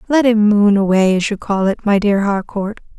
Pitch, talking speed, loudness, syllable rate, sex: 205 Hz, 220 wpm, -15 LUFS, 4.9 syllables/s, female